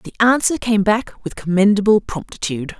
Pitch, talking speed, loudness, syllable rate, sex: 205 Hz, 150 wpm, -17 LUFS, 5.5 syllables/s, female